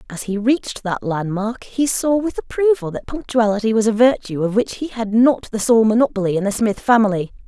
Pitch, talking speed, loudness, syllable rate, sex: 225 Hz, 215 wpm, -18 LUFS, 5.4 syllables/s, female